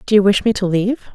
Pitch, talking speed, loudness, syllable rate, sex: 205 Hz, 315 wpm, -16 LUFS, 7.4 syllables/s, female